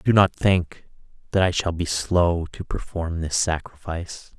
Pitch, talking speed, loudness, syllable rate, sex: 85 Hz, 165 wpm, -23 LUFS, 4.2 syllables/s, male